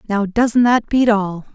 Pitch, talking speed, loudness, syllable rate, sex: 215 Hz, 195 wpm, -16 LUFS, 4.0 syllables/s, female